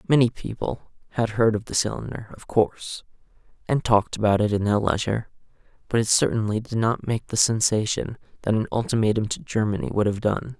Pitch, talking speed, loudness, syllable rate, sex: 110 Hz, 180 wpm, -23 LUFS, 5.8 syllables/s, male